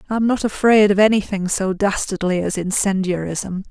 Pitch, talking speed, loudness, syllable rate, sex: 195 Hz, 145 wpm, -18 LUFS, 4.9 syllables/s, female